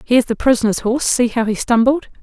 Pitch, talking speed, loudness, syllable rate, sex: 240 Hz, 215 wpm, -16 LUFS, 6.4 syllables/s, female